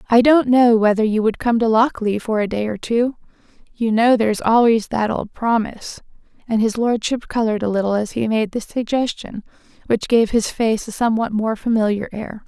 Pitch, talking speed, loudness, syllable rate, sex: 225 Hz, 195 wpm, -18 LUFS, 5.3 syllables/s, female